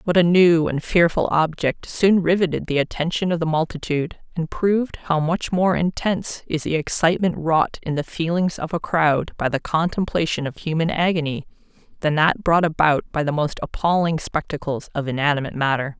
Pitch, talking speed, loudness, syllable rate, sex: 160 Hz, 175 wpm, -21 LUFS, 5.3 syllables/s, female